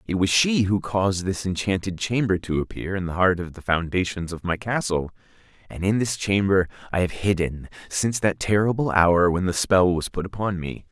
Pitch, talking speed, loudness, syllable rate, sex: 95 Hz, 205 wpm, -23 LUFS, 5.2 syllables/s, male